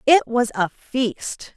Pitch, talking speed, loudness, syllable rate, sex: 245 Hz, 155 wpm, -22 LUFS, 3.3 syllables/s, female